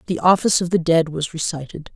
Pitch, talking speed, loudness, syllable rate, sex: 165 Hz, 215 wpm, -19 LUFS, 6.2 syllables/s, female